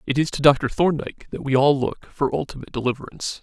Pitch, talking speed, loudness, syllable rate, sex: 140 Hz, 210 wpm, -22 LUFS, 6.5 syllables/s, male